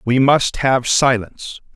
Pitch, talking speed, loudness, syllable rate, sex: 125 Hz, 135 wpm, -15 LUFS, 3.9 syllables/s, male